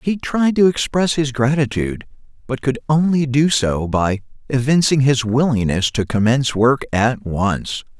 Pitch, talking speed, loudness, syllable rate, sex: 130 Hz, 150 wpm, -17 LUFS, 4.5 syllables/s, male